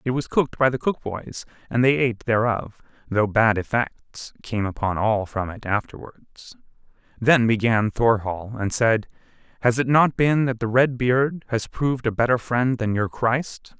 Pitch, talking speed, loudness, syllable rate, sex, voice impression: 120 Hz, 175 wpm, -22 LUFS, 4.4 syllables/s, male, very masculine, very adult-like, old, very thick, slightly relaxed, powerful, slightly bright, soft, slightly muffled, fluent, raspy, cool, very intellectual, very sincere, calm, very mature, very friendly, very reassuring, very unique, elegant, wild, sweet, lively, kind, intense, slightly modest